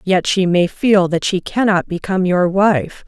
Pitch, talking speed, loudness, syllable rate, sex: 185 Hz, 195 wpm, -16 LUFS, 4.4 syllables/s, female